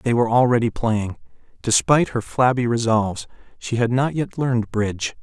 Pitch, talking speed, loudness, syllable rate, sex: 120 Hz, 160 wpm, -20 LUFS, 5.4 syllables/s, male